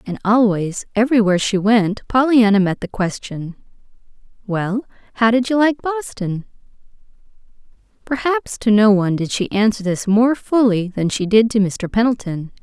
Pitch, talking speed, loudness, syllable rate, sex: 215 Hz, 145 wpm, -17 LUFS, 4.9 syllables/s, female